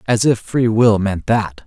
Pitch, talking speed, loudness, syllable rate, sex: 110 Hz, 215 wpm, -16 LUFS, 3.9 syllables/s, male